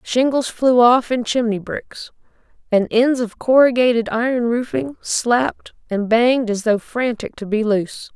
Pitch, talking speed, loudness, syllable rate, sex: 235 Hz, 155 wpm, -18 LUFS, 4.4 syllables/s, female